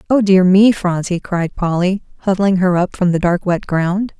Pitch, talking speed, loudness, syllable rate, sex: 185 Hz, 200 wpm, -15 LUFS, 4.5 syllables/s, female